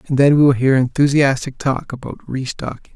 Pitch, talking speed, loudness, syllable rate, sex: 135 Hz, 180 wpm, -16 LUFS, 5.4 syllables/s, male